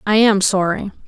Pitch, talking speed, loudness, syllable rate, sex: 200 Hz, 170 wpm, -16 LUFS, 4.9 syllables/s, female